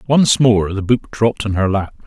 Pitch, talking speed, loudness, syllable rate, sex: 110 Hz, 230 wpm, -16 LUFS, 5.0 syllables/s, male